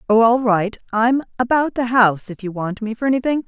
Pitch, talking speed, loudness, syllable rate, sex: 230 Hz, 225 wpm, -18 LUFS, 5.7 syllables/s, female